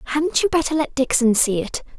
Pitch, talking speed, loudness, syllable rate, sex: 275 Hz, 210 wpm, -19 LUFS, 5.8 syllables/s, female